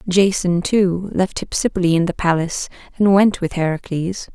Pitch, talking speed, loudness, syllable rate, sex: 180 Hz, 150 wpm, -18 LUFS, 5.0 syllables/s, female